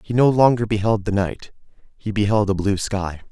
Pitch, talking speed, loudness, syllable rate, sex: 105 Hz, 200 wpm, -20 LUFS, 5.2 syllables/s, male